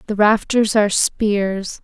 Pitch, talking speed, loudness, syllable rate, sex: 210 Hz, 130 wpm, -17 LUFS, 3.6 syllables/s, female